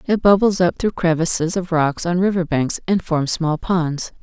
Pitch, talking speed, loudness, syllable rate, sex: 170 Hz, 200 wpm, -18 LUFS, 4.5 syllables/s, female